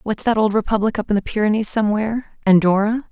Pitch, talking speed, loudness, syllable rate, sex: 215 Hz, 175 wpm, -18 LUFS, 6.6 syllables/s, female